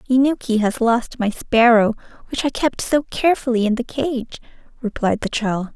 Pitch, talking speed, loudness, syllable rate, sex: 240 Hz, 165 wpm, -19 LUFS, 4.8 syllables/s, female